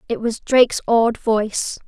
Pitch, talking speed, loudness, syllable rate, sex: 230 Hz, 160 wpm, -18 LUFS, 4.4 syllables/s, female